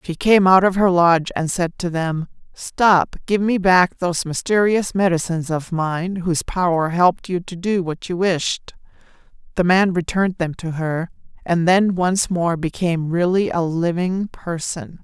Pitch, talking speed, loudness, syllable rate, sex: 175 Hz, 170 wpm, -19 LUFS, 4.5 syllables/s, female